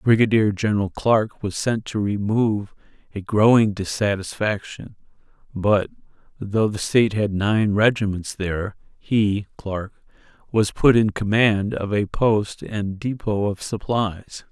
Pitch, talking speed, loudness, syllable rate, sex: 105 Hz, 130 wpm, -21 LUFS, 4.3 syllables/s, male